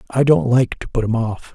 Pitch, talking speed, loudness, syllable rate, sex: 120 Hz, 270 wpm, -18 LUFS, 5.2 syllables/s, male